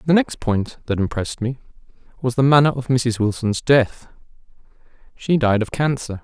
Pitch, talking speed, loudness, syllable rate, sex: 125 Hz, 165 wpm, -19 LUFS, 5.0 syllables/s, male